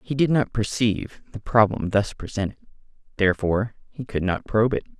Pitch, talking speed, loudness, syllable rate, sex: 110 Hz, 170 wpm, -23 LUFS, 5.8 syllables/s, male